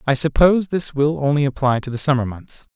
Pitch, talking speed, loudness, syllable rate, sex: 140 Hz, 220 wpm, -18 LUFS, 5.9 syllables/s, male